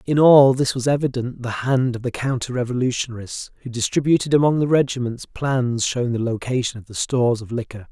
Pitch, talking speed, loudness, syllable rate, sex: 125 Hz, 190 wpm, -20 LUFS, 5.7 syllables/s, male